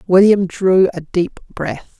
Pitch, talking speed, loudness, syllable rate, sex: 185 Hz, 150 wpm, -16 LUFS, 3.6 syllables/s, female